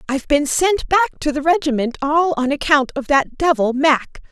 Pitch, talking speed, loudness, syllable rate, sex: 295 Hz, 195 wpm, -17 LUFS, 5.1 syllables/s, female